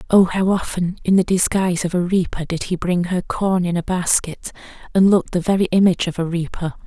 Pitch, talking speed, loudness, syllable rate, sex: 180 Hz, 220 wpm, -19 LUFS, 5.8 syllables/s, female